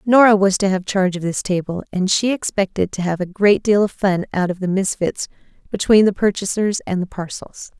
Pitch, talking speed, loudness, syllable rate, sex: 195 Hz, 215 wpm, -18 LUFS, 5.4 syllables/s, female